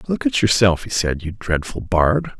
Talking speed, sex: 200 wpm, male